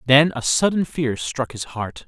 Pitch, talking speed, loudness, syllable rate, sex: 140 Hz, 200 wpm, -21 LUFS, 4.2 syllables/s, male